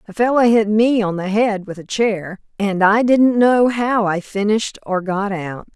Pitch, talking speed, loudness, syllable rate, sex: 210 Hz, 210 wpm, -17 LUFS, 4.3 syllables/s, female